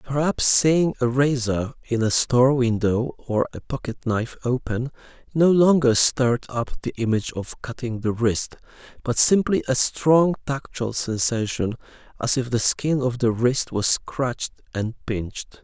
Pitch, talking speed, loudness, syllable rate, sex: 125 Hz, 155 wpm, -22 LUFS, 4.4 syllables/s, male